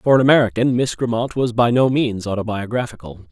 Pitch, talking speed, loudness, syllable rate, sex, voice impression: 120 Hz, 180 wpm, -18 LUFS, 6.0 syllables/s, male, masculine, middle-aged, tensed, powerful, hard, fluent, mature, wild, lively, strict, intense